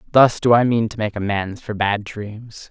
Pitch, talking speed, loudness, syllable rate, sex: 110 Hz, 220 wpm, -19 LUFS, 4.5 syllables/s, male